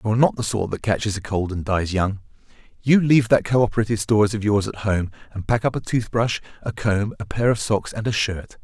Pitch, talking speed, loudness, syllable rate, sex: 105 Hz, 245 wpm, -21 LUFS, 5.9 syllables/s, male